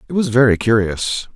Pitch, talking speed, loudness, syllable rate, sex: 115 Hz, 175 wpm, -16 LUFS, 5.3 syllables/s, male